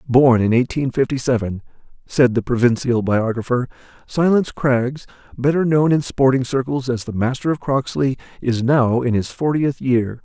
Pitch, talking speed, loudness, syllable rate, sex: 125 Hz, 160 wpm, -18 LUFS, 4.1 syllables/s, male